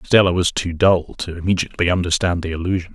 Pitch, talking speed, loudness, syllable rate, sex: 90 Hz, 185 wpm, -19 LUFS, 6.4 syllables/s, male